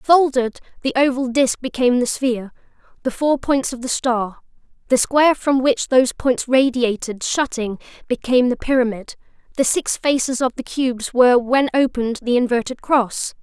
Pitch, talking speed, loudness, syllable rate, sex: 250 Hz, 160 wpm, -19 LUFS, 5.1 syllables/s, female